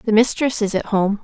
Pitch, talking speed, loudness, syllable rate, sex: 220 Hz, 245 wpm, -19 LUFS, 5.0 syllables/s, female